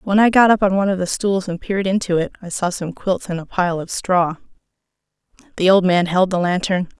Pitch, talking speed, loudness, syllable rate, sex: 185 Hz, 240 wpm, -18 LUFS, 5.7 syllables/s, female